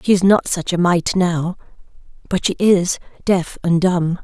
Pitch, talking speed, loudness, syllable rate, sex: 180 Hz, 185 wpm, -17 LUFS, 4.2 syllables/s, female